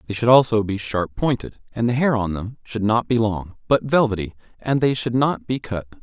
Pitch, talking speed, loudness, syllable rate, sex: 115 Hz, 230 wpm, -21 LUFS, 5.2 syllables/s, male